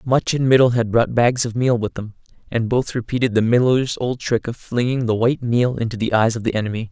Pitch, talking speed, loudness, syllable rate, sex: 120 Hz, 245 wpm, -19 LUFS, 5.8 syllables/s, male